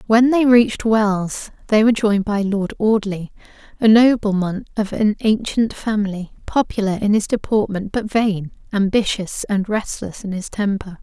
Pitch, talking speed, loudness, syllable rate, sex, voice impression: 210 Hz, 150 wpm, -18 LUFS, 4.7 syllables/s, female, feminine, adult-like, slightly relaxed, slightly weak, soft, fluent, intellectual, calm, friendly, reassuring, elegant, kind, slightly modest